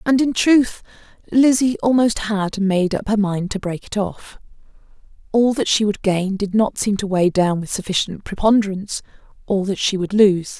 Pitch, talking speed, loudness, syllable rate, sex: 205 Hz, 185 wpm, -18 LUFS, 4.8 syllables/s, female